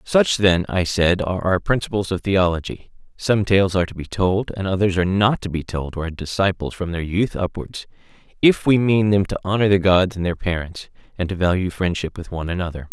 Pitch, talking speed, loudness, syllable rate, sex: 95 Hz, 215 wpm, -20 LUFS, 5.6 syllables/s, male